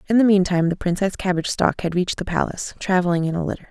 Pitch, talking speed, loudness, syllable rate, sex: 180 Hz, 245 wpm, -21 LUFS, 7.6 syllables/s, female